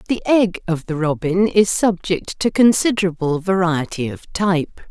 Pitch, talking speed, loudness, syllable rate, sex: 180 Hz, 145 wpm, -18 LUFS, 4.6 syllables/s, female